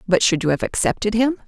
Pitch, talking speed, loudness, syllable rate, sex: 205 Hz, 245 wpm, -19 LUFS, 6.5 syllables/s, female